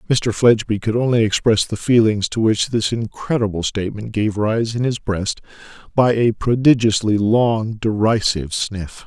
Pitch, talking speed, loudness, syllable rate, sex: 110 Hz, 150 wpm, -18 LUFS, 4.7 syllables/s, male